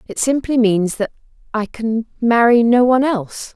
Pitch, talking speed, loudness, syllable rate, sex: 230 Hz, 170 wpm, -16 LUFS, 4.9 syllables/s, female